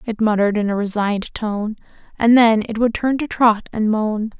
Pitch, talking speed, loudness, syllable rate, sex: 220 Hz, 205 wpm, -18 LUFS, 5.1 syllables/s, female